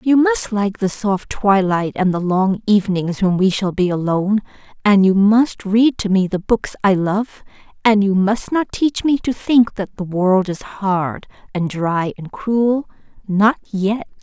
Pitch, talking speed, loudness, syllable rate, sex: 205 Hz, 180 wpm, -17 LUFS, 4.1 syllables/s, female